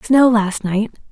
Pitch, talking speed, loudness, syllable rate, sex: 220 Hz, 160 wpm, -16 LUFS, 3.2 syllables/s, female